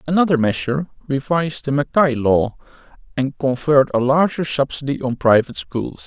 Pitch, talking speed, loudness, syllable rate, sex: 135 Hz, 140 wpm, -18 LUFS, 5.4 syllables/s, male